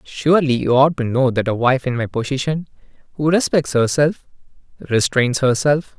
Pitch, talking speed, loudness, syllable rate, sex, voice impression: 135 Hz, 160 wpm, -17 LUFS, 4.9 syllables/s, male, masculine, adult-like, tensed, slightly powerful, bright, clear, fluent, intellectual, friendly, reassuring, unique, lively, slightly light